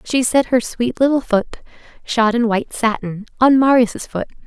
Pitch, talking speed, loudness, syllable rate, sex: 235 Hz, 175 wpm, -17 LUFS, 4.7 syllables/s, female